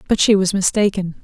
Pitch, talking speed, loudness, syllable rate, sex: 195 Hz, 195 wpm, -16 LUFS, 5.8 syllables/s, female